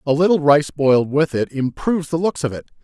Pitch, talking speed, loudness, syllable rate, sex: 150 Hz, 235 wpm, -18 LUFS, 5.9 syllables/s, male